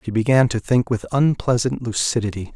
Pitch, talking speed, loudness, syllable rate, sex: 120 Hz, 165 wpm, -20 LUFS, 5.5 syllables/s, male